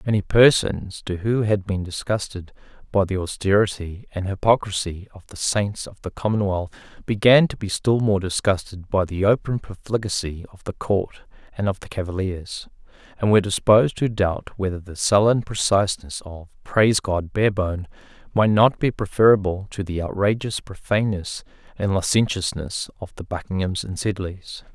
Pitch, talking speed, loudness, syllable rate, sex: 100 Hz, 155 wpm, -22 LUFS, 5.1 syllables/s, male